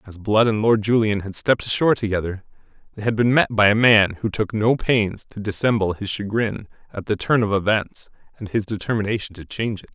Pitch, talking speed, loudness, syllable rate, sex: 105 Hz, 210 wpm, -20 LUFS, 5.7 syllables/s, male